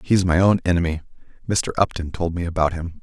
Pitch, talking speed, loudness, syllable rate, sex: 85 Hz, 200 wpm, -21 LUFS, 6.0 syllables/s, male